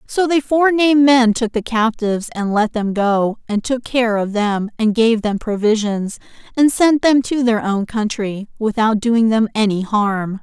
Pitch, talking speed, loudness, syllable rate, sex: 225 Hz, 185 wpm, -16 LUFS, 4.4 syllables/s, female